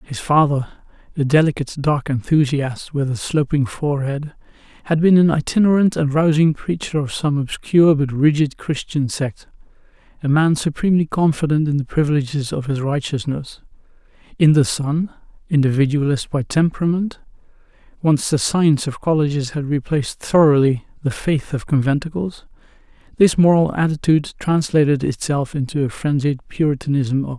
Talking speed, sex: 135 wpm, male